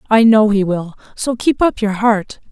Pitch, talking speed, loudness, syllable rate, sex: 215 Hz, 215 wpm, -15 LUFS, 4.2 syllables/s, female